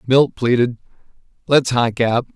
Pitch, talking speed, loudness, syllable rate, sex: 125 Hz, 125 wpm, -17 LUFS, 4.1 syllables/s, male